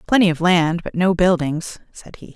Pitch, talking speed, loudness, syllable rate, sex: 175 Hz, 205 wpm, -18 LUFS, 4.9 syllables/s, female